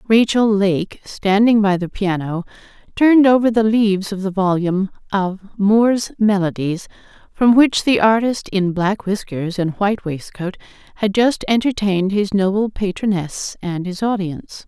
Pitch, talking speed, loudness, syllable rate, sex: 200 Hz, 145 wpm, -17 LUFS, 4.6 syllables/s, female